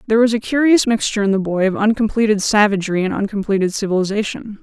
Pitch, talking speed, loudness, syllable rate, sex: 210 Hz, 180 wpm, -17 LUFS, 6.9 syllables/s, female